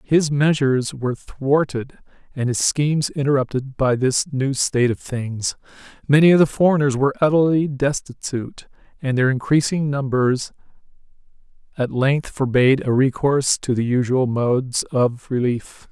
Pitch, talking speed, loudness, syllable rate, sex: 135 Hz, 135 wpm, -19 LUFS, 4.8 syllables/s, male